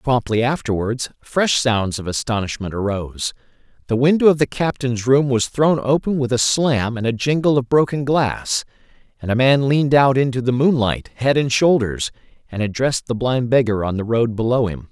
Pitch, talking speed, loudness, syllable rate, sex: 125 Hz, 185 wpm, -18 LUFS, 5.1 syllables/s, male